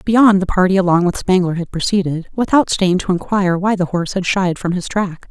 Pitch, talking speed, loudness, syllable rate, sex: 185 Hz, 215 wpm, -16 LUFS, 5.6 syllables/s, female